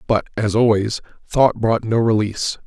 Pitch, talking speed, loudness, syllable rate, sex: 110 Hz, 160 wpm, -18 LUFS, 4.8 syllables/s, male